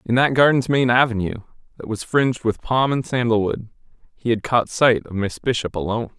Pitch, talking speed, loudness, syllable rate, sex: 120 Hz, 195 wpm, -20 LUFS, 5.7 syllables/s, male